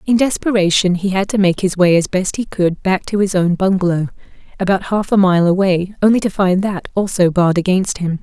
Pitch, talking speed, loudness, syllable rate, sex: 190 Hz, 220 wpm, -15 LUFS, 5.5 syllables/s, female